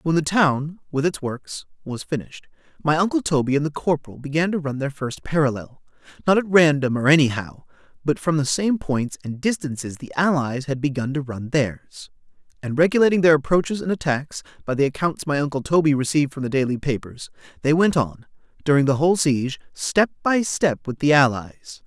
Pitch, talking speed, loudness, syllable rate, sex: 145 Hz, 185 wpm, -21 LUFS, 5.5 syllables/s, male